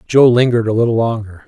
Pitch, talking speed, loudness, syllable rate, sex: 115 Hz, 205 wpm, -13 LUFS, 6.8 syllables/s, male